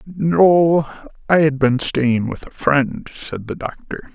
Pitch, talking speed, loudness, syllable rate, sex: 145 Hz, 160 wpm, -17 LUFS, 3.4 syllables/s, male